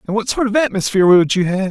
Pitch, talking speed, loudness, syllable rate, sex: 205 Hz, 280 wpm, -15 LUFS, 6.8 syllables/s, male